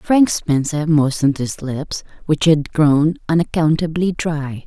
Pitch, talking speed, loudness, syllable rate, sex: 155 Hz, 130 wpm, -17 LUFS, 4.0 syllables/s, female